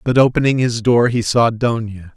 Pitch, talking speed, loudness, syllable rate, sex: 115 Hz, 195 wpm, -16 LUFS, 4.9 syllables/s, male